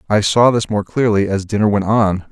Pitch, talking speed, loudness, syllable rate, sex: 105 Hz, 235 wpm, -15 LUFS, 5.2 syllables/s, male